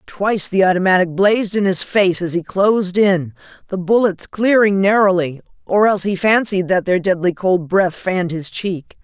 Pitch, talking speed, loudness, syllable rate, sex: 190 Hz, 175 wpm, -16 LUFS, 5.0 syllables/s, female